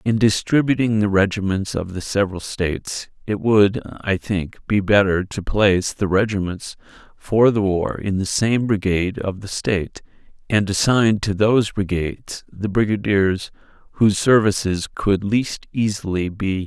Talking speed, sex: 155 wpm, male